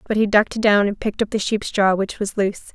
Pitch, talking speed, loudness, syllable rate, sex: 205 Hz, 285 wpm, -19 LUFS, 6.5 syllables/s, female